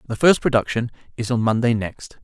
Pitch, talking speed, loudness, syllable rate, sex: 115 Hz, 190 wpm, -20 LUFS, 5.7 syllables/s, male